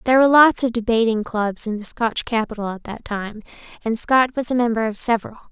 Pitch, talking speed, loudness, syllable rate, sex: 230 Hz, 220 wpm, -19 LUFS, 5.9 syllables/s, female